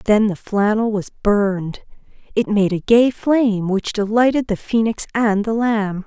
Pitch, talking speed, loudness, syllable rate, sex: 215 Hz, 170 wpm, -18 LUFS, 4.3 syllables/s, female